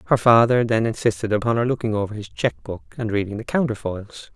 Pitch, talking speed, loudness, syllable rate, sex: 110 Hz, 195 wpm, -21 LUFS, 5.9 syllables/s, male